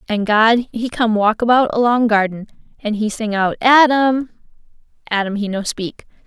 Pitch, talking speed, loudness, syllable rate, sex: 225 Hz, 165 wpm, -16 LUFS, 4.6 syllables/s, female